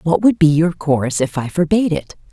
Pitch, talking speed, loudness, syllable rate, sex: 165 Hz, 235 wpm, -16 LUFS, 5.7 syllables/s, female